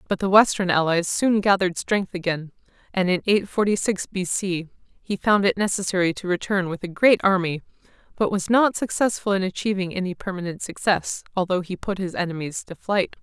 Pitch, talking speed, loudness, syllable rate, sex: 190 Hz, 185 wpm, -22 LUFS, 5.4 syllables/s, female